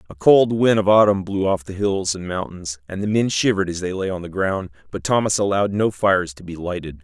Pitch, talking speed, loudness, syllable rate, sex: 95 Hz, 250 wpm, -20 LUFS, 5.8 syllables/s, male